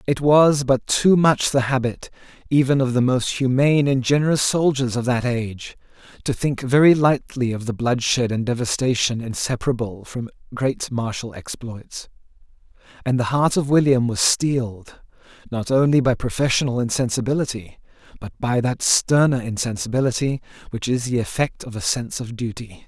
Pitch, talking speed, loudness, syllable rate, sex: 125 Hz, 150 wpm, -20 LUFS, 5.0 syllables/s, male